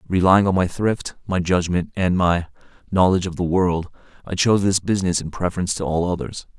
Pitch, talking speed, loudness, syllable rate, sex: 90 Hz, 190 wpm, -20 LUFS, 5.9 syllables/s, male